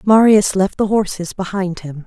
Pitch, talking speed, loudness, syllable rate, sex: 195 Hz, 175 wpm, -16 LUFS, 4.6 syllables/s, female